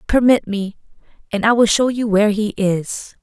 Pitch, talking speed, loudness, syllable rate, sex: 215 Hz, 185 wpm, -17 LUFS, 4.9 syllables/s, female